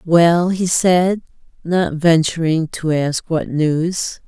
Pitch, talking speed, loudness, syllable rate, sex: 165 Hz, 125 wpm, -17 LUFS, 3.0 syllables/s, female